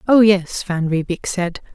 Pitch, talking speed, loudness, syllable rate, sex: 185 Hz, 170 wpm, -18 LUFS, 4.0 syllables/s, female